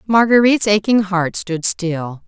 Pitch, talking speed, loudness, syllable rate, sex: 195 Hz, 130 wpm, -16 LUFS, 4.3 syllables/s, female